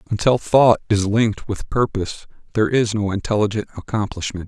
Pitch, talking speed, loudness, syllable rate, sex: 105 Hz, 145 wpm, -20 LUFS, 5.8 syllables/s, male